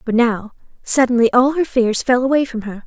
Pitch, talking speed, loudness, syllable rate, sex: 245 Hz, 210 wpm, -16 LUFS, 5.3 syllables/s, female